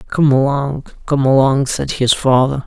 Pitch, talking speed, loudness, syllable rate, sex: 135 Hz, 155 wpm, -15 LUFS, 4.0 syllables/s, male